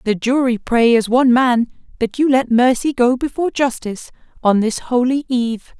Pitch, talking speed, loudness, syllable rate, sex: 245 Hz, 175 wpm, -16 LUFS, 5.1 syllables/s, female